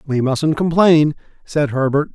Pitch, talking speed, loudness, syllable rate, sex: 150 Hz, 140 wpm, -16 LUFS, 4.2 syllables/s, male